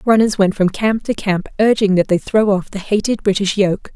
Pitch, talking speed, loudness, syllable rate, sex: 200 Hz, 225 wpm, -16 LUFS, 5.1 syllables/s, female